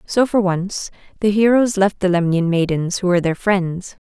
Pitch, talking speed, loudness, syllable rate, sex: 190 Hz, 190 wpm, -18 LUFS, 4.7 syllables/s, female